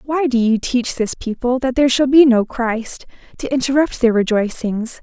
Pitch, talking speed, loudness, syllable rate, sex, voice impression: 250 Hz, 190 wpm, -17 LUFS, 4.8 syllables/s, female, feminine, slightly adult-like, soft, slightly calm, friendly, slightly reassuring, kind